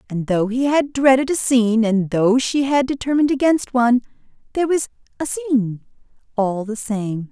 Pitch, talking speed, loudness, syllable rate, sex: 245 Hz, 170 wpm, -19 LUFS, 5.3 syllables/s, female